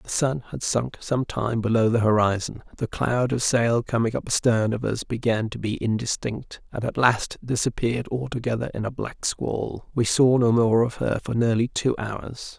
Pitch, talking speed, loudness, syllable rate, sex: 115 Hz, 195 wpm, -24 LUFS, 4.7 syllables/s, male